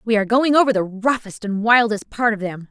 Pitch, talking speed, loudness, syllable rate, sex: 220 Hz, 245 wpm, -18 LUFS, 5.8 syllables/s, female